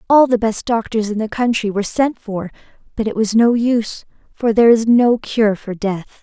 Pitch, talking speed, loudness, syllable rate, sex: 220 Hz, 210 wpm, -16 LUFS, 5.1 syllables/s, female